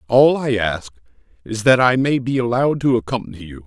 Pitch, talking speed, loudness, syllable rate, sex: 120 Hz, 195 wpm, -17 LUFS, 5.7 syllables/s, male